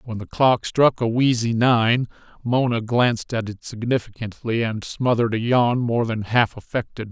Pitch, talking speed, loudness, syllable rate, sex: 115 Hz, 170 wpm, -21 LUFS, 4.7 syllables/s, male